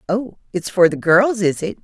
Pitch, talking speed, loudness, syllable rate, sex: 195 Hz, 230 wpm, -17 LUFS, 4.7 syllables/s, female